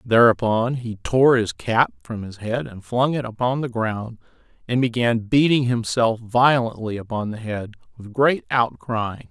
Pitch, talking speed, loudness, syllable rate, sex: 120 Hz, 160 wpm, -21 LUFS, 4.2 syllables/s, male